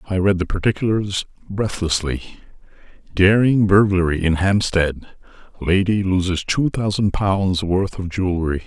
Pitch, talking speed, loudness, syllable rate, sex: 95 Hz, 110 wpm, -19 LUFS, 4.6 syllables/s, male